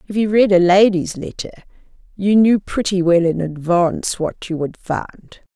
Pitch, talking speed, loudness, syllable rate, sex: 185 Hz, 175 wpm, -17 LUFS, 4.5 syllables/s, female